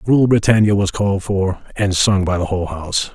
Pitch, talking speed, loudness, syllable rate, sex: 100 Hz, 210 wpm, -17 LUFS, 5.5 syllables/s, male